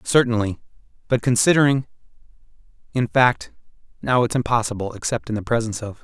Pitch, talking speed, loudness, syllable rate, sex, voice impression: 120 Hz, 130 wpm, -20 LUFS, 6.2 syllables/s, male, very masculine, very adult-like, middle-aged, thick, very tensed, powerful, very bright, slightly soft, clear, very fluent, slightly raspy, cool, very intellectual, refreshing, calm, friendly, reassuring, very unique, slightly elegant, wild, slightly sweet, lively, slightly intense